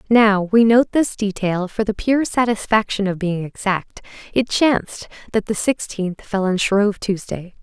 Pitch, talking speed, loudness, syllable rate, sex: 210 Hz, 165 wpm, -19 LUFS, 4.4 syllables/s, female